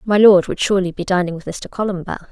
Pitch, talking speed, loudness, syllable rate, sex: 185 Hz, 235 wpm, -17 LUFS, 6.4 syllables/s, female